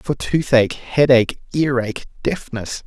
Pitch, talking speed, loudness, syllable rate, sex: 125 Hz, 105 wpm, -18 LUFS, 4.7 syllables/s, male